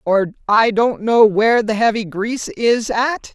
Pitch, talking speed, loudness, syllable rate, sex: 225 Hz, 180 wpm, -16 LUFS, 4.3 syllables/s, female